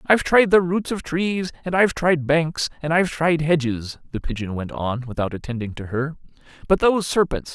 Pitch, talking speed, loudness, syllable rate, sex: 155 Hz, 200 wpm, -21 LUFS, 5.3 syllables/s, male